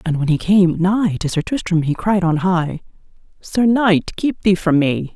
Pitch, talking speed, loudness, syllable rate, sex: 180 Hz, 210 wpm, -17 LUFS, 4.3 syllables/s, female